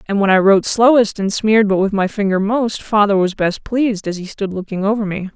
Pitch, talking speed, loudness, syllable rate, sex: 205 Hz, 245 wpm, -16 LUFS, 5.8 syllables/s, female